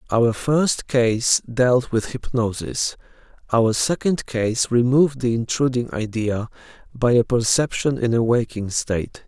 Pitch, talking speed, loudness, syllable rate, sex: 120 Hz, 130 wpm, -20 LUFS, 4.0 syllables/s, male